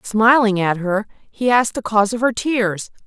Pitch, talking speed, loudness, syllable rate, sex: 220 Hz, 195 wpm, -17 LUFS, 4.8 syllables/s, female